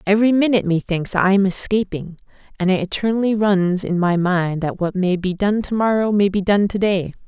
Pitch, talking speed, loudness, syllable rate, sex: 195 Hz, 205 wpm, -18 LUFS, 5.4 syllables/s, female